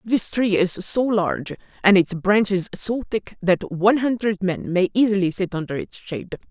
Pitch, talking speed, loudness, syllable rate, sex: 195 Hz, 185 wpm, -21 LUFS, 4.8 syllables/s, female